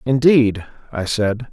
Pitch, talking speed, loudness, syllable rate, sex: 115 Hz, 120 wpm, -17 LUFS, 3.5 syllables/s, male